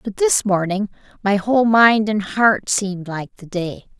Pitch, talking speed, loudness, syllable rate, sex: 205 Hz, 180 wpm, -18 LUFS, 4.4 syllables/s, female